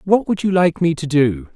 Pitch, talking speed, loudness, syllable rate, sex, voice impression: 160 Hz, 270 wpm, -17 LUFS, 5.0 syllables/s, male, very masculine, very adult-like, very middle-aged, thick, tensed, powerful, bright, slightly soft, slightly clear, fluent, slightly cool, intellectual, refreshing, slightly sincere, calm, mature, very friendly, reassuring, unique, slightly elegant, slightly wild, slightly sweet, lively, kind, slightly intense, slightly light